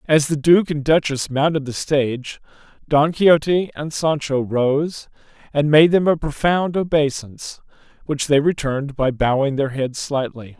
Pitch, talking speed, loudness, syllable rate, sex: 145 Hz, 155 wpm, -19 LUFS, 4.5 syllables/s, male